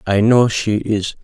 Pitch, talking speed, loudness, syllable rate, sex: 105 Hz, 195 wpm, -16 LUFS, 3.8 syllables/s, male